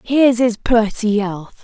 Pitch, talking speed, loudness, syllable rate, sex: 225 Hz, 145 wpm, -16 LUFS, 3.9 syllables/s, female